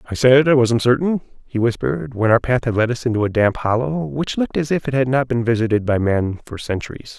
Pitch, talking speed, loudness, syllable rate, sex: 120 Hz, 250 wpm, -18 LUFS, 6.0 syllables/s, male